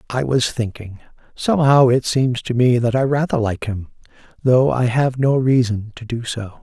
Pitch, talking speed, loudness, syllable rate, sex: 125 Hz, 190 wpm, -18 LUFS, 4.7 syllables/s, male